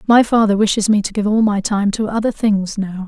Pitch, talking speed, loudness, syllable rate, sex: 210 Hz, 255 wpm, -16 LUFS, 5.5 syllables/s, female